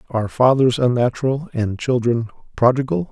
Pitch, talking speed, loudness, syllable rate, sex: 125 Hz, 115 wpm, -18 LUFS, 5.3 syllables/s, male